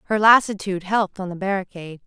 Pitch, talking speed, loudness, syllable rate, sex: 195 Hz, 175 wpm, -20 LUFS, 7.1 syllables/s, female